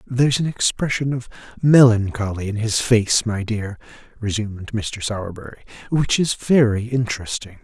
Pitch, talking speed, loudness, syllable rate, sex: 115 Hz, 135 wpm, -20 LUFS, 5.0 syllables/s, male